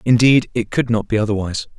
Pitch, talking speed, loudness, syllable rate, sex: 115 Hz, 200 wpm, -17 LUFS, 6.3 syllables/s, male